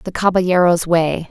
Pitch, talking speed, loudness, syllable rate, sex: 175 Hz, 140 wpm, -15 LUFS, 4.7 syllables/s, female